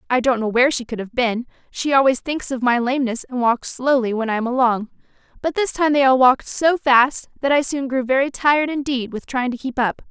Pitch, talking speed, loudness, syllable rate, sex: 255 Hz, 245 wpm, -19 LUFS, 5.7 syllables/s, female